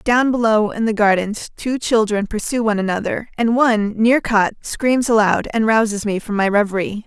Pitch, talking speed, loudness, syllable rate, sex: 220 Hz, 185 wpm, -17 LUFS, 5.0 syllables/s, female